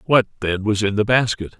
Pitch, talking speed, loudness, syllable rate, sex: 105 Hz, 225 wpm, -19 LUFS, 5.4 syllables/s, male